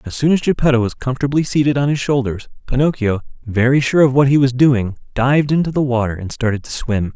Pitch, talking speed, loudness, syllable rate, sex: 130 Hz, 220 wpm, -16 LUFS, 6.2 syllables/s, male